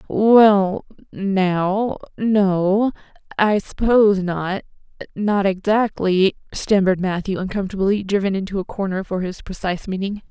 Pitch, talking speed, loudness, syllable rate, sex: 195 Hz, 105 wpm, -19 LUFS, 4.3 syllables/s, female